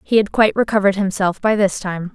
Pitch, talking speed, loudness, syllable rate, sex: 200 Hz, 225 wpm, -17 LUFS, 6.3 syllables/s, female